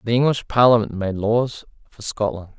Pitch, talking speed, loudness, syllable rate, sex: 110 Hz, 160 wpm, -20 LUFS, 5.1 syllables/s, male